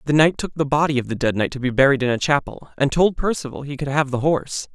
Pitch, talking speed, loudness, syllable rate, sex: 140 Hz, 290 wpm, -20 LUFS, 6.5 syllables/s, male